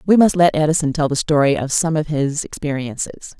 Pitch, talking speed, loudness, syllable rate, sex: 150 Hz, 210 wpm, -18 LUFS, 5.5 syllables/s, female